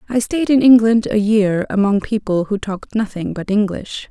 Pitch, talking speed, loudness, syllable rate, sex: 210 Hz, 190 wpm, -16 LUFS, 5.0 syllables/s, female